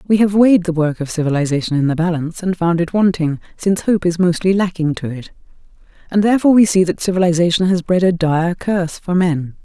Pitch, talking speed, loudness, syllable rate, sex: 175 Hz, 210 wpm, -16 LUFS, 6.2 syllables/s, female